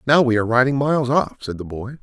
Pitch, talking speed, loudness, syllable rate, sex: 125 Hz, 265 wpm, -19 LUFS, 6.7 syllables/s, male